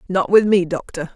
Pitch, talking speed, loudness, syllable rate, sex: 180 Hz, 210 wpm, -17 LUFS, 5.2 syllables/s, female